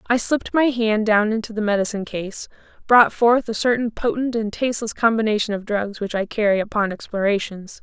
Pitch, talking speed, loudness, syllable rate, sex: 220 Hz, 185 wpm, -20 LUFS, 5.6 syllables/s, female